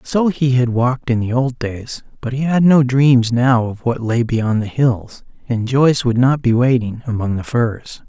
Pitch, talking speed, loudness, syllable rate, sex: 125 Hz, 215 wpm, -16 LUFS, 4.4 syllables/s, male